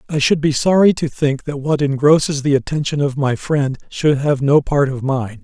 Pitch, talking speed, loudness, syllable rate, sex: 140 Hz, 220 wpm, -16 LUFS, 4.9 syllables/s, male